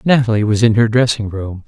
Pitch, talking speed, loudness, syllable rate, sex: 110 Hz, 215 wpm, -14 LUFS, 5.7 syllables/s, male